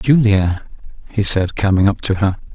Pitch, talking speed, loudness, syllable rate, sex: 100 Hz, 165 wpm, -16 LUFS, 4.6 syllables/s, male